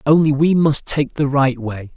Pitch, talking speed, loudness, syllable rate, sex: 140 Hz, 215 wpm, -16 LUFS, 4.4 syllables/s, male